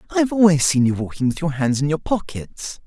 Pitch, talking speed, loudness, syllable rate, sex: 160 Hz, 250 wpm, -19 LUFS, 6.0 syllables/s, male